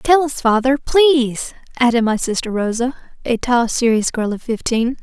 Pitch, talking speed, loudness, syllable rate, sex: 245 Hz, 165 wpm, -17 LUFS, 4.8 syllables/s, female